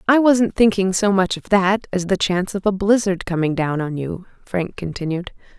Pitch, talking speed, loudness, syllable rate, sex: 190 Hz, 205 wpm, -19 LUFS, 5.0 syllables/s, female